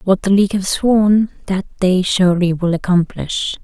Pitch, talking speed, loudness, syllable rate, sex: 190 Hz, 165 wpm, -16 LUFS, 4.8 syllables/s, female